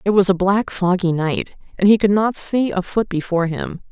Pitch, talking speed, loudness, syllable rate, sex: 190 Hz, 230 wpm, -18 LUFS, 5.2 syllables/s, female